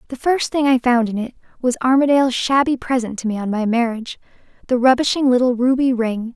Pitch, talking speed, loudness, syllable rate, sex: 250 Hz, 190 wpm, -18 LUFS, 6.0 syllables/s, female